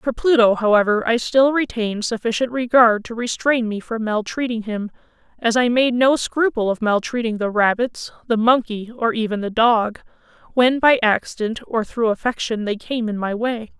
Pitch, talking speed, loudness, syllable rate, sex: 230 Hz, 175 wpm, -19 LUFS, 4.9 syllables/s, female